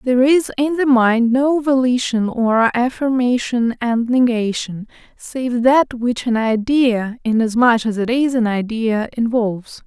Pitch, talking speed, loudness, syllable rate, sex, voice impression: 240 Hz, 140 wpm, -17 LUFS, 4.0 syllables/s, female, very feminine, slightly young, slightly adult-like, very thin, tensed, slightly weak, slightly bright, hard, clear, fluent, cute, slightly cool, intellectual, very refreshing, sincere, very calm, very friendly, reassuring, unique, elegant, very sweet, lively, kind, slightly sharp, slightly modest